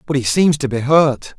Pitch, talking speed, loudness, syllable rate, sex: 140 Hz, 260 wpm, -15 LUFS, 4.9 syllables/s, male